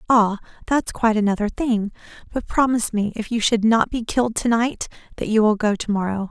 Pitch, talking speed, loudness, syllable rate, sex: 220 Hz, 190 wpm, -20 LUFS, 5.7 syllables/s, female